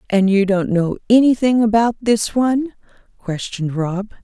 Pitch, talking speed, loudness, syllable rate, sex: 210 Hz, 140 wpm, -17 LUFS, 4.8 syllables/s, female